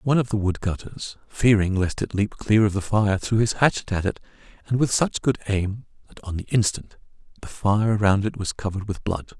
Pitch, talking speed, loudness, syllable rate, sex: 105 Hz, 215 wpm, -23 LUFS, 5.4 syllables/s, male